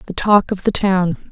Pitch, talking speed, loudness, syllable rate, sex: 195 Hz, 230 wpm, -16 LUFS, 4.8 syllables/s, female